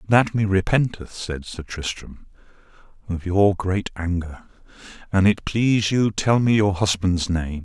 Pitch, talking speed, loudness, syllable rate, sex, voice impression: 95 Hz, 150 wpm, -21 LUFS, 4.2 syllables/s, male, masculine, adult-like, slightly thick, slightly refreshing, sincere, calm